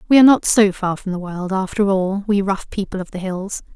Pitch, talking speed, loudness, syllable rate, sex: 195 Hz, 255 wpm, -18 LUFS, 5.5 syllables/s, female